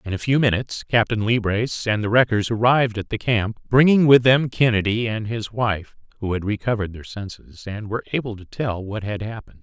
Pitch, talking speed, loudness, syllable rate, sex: 110 Hz, 205 wpm, -20 LUFS, 5.8 syllables/s, male